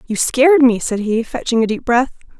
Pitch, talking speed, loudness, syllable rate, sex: 245 Hz, 225 wpm, -15 LUFS, 5.5 syllables/s, female